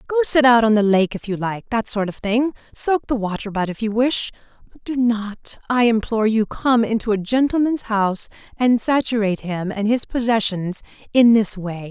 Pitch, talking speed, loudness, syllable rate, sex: 225 Hz, 200 wpm, -19 LUFS, 5.1 syllables/s, female